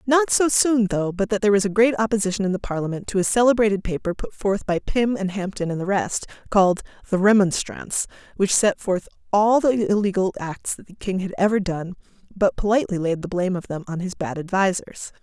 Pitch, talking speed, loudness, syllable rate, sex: 200 Hz, 215 wpm, -22 LUFS, 5.8 syllables/s, female